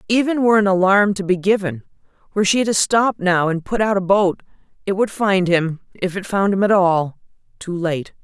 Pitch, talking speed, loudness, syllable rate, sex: 190 Hz, 210 wpm, -18 LUFS, 5.2 syllables/s, female